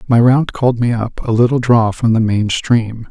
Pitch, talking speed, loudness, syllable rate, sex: 115 Hz, 230 wpm, -14 LUFS, 5.2 syllables/s, male